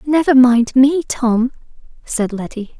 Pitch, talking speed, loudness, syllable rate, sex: 255 Hz, 130 wpm, -15 LUFS, 3.7 syllables/s, female